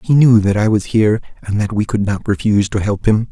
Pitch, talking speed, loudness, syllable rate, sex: 105 Hz, 270 wpm, -15 LUFS, 6.0 syllables/s, male